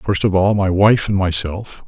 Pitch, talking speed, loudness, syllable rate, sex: 95 Hz, 225 wpm, -16 LUFS, 4.4 syllables/s, male